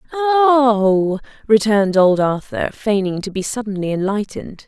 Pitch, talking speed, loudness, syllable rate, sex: 215 Hz, 115 wpm, -17 LUFS, 4.4 syllables/s, female